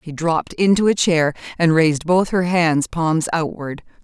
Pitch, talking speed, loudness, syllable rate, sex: 165 Hz, 180 wpm, -18 LUFS, 4.6 syllables/s, female